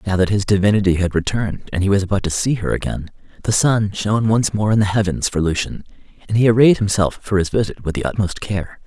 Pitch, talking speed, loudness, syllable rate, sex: 100 Hz, 235 wpm, -18 LUFS, 6.2 syllables/s, male